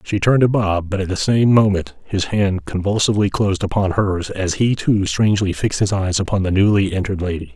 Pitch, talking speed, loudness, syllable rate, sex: 100 Hz, 215 wpm, -18 LUFS, 5.8 syllables/s, male